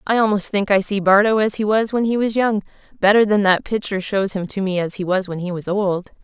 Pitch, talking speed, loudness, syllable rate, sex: 200 Hz, 270 wpm, -18 LUFS, 5.8 syllables/s, female